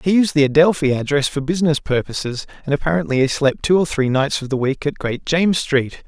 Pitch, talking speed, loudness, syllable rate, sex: 145 Hz, 225 wpm, -18 LUFS, 5.9 syllables/s, male